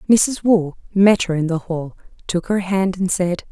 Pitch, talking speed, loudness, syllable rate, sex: 185 Hz, 205 wpm, -18 LUFS, 4.3 syllables/s, female